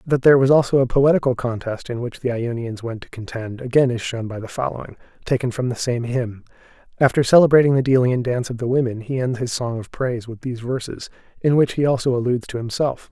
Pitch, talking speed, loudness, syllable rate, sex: 125 Hz, 225 wpm, -20 LUFS, 6.2 syllables/s, male